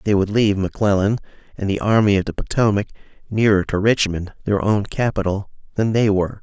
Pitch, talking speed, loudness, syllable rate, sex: 100 Hz, 175 wpm, -19 LUFS, 6.0 syllables/s, male